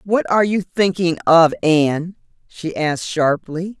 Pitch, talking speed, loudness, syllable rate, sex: 170 Hz, 140 wpm, -17 LUFS, 4.4 syllables/s, female